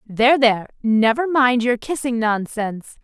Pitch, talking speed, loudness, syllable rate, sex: 240 Hz, 140 wpm, -18 LUFS, 4.8 syllables/s, female